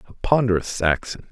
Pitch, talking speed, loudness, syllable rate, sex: 105 Hz, 135 wpm, -21 LUFS, 5.5 syllables/s, male